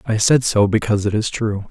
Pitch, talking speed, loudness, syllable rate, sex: 110 Hz, 245 wpm, -17 LUFS, 5.7 syllables/s, male